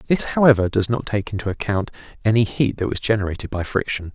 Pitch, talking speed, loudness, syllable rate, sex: 110 Hz, 205 wpm, -21 LUFS, 6.4 syllables/s, male